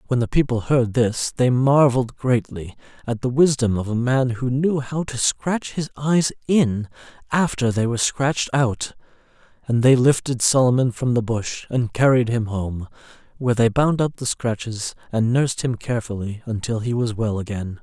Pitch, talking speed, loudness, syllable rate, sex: 125 Hz, 180 wpm, -21 LUFS, 4.8 syllables/s, male